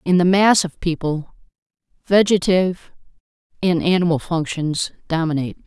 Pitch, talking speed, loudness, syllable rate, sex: 170 Hz, 105 wpm, -19 LUFS, 5.3 syllables/s, female